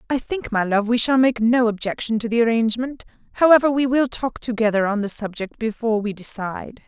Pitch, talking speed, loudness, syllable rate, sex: 230 Hz, 200 wpm, -20 LUFS, 5.9 syllables/s, female